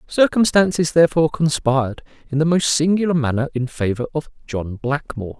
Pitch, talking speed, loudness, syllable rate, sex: 145 Hz, 145 wpm, -19 LUFS, 5.8 syllables/s, male